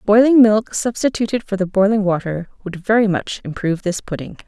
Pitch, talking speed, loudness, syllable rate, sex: 205 Hz, 175 wpm, -17 LUFS, 5.6 syllables/s, female